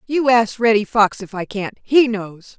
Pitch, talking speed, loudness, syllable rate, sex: 220 Hz, 210 wpm, -17 LUFS, 4.2 syllables/s, female